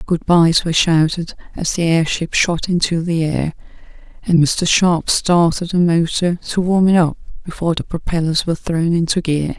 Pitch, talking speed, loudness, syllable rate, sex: 165 Hz, 175 wpm, -16 LUFS, 4.8 syllables/s, female